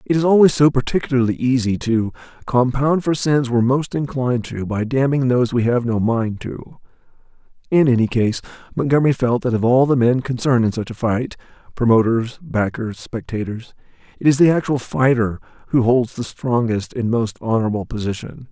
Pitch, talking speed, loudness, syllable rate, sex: 125 Hz, 165 wpm, -18 LUFS, 5.4 syllables/s, male